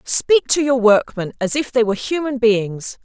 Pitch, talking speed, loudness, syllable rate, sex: 240 Hz, 195 wpm, -17 LUFS, 4.6 syllables/s, female